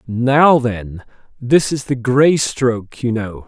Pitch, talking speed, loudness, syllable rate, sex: 125 Hz, 155 wpm, -15 LUFS, 3.3 syllables/s, male